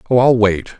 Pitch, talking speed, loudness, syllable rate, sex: 110 Hz, 225 wpm, -14 LUFS, 5.1 syllables/s, male